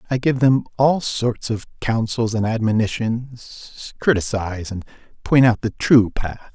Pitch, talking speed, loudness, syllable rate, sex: 115 Hz, 145 wpm, -19 LUFS, 4.2 syllables/s, male